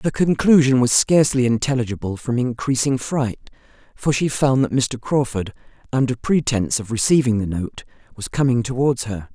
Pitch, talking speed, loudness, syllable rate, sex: 125 Hz, 155 wpm, -19 LUFS, 5.2 syllables/s, female